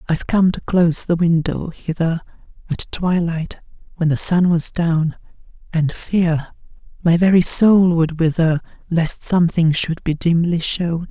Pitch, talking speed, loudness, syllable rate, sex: 170 Hz, 145 wpm, -18 LUFS, 4.2 syllables/s, female